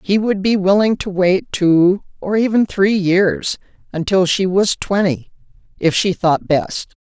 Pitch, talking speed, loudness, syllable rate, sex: 190 Hz, 160 wpm, -16 LUFS, 3.9 syllables/s, female